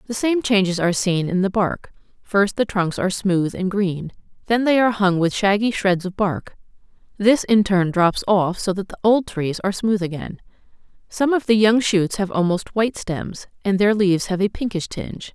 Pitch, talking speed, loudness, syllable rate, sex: 200 Hz, 205 wpm, -20 LUFS, 5.1 syllables/s, female